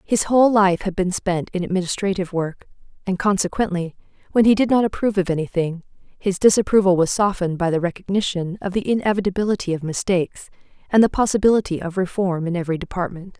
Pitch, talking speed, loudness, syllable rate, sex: 190 Hz, 170 wpm, -20 LUFS, 6.4 syllables/s, female